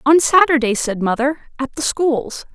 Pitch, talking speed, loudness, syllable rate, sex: 270 Hz, 165 wpm, -17 LUFS, 4.4 syllables/s, female